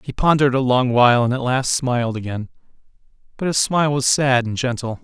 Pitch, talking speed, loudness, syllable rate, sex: 130 Hz, 205 wpm, -18 LUFS, 5.9 syllables/s, male